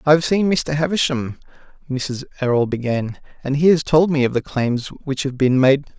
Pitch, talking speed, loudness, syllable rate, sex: 140 Hz, 200 wpm, -19 LUFS, 5.2 syllables/s, male